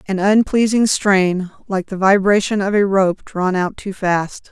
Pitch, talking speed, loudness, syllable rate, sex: 195 Hz, 175 wpm, -17 LUFS, 4.0 syllables/s, female